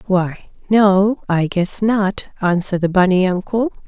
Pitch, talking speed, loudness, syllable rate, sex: 195 Hz, 140 wpm, -17 LUFS, 4.1 syllables/s, female